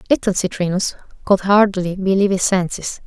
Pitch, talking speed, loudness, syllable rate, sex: 190 Hz, 135 wpm, -18 LUFS, 5.5 syllables/s, female